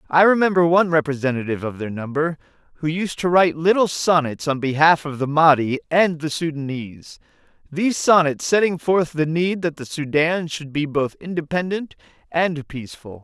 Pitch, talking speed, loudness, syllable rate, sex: 155 Hz, 165 wpm, -20 LUFS, 5.3 syllables/s, male